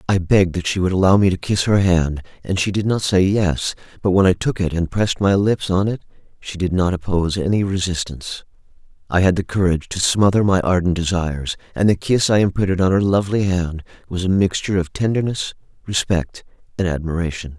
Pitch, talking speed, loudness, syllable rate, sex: 95 Hz, 205 wpm, -19 LUFS, 5.9 syllables/s, male